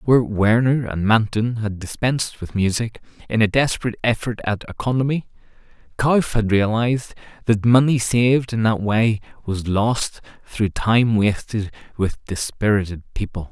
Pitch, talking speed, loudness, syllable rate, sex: 110 Hz, 140 wpm, -20 LUFS, 4.8 syllables/s, male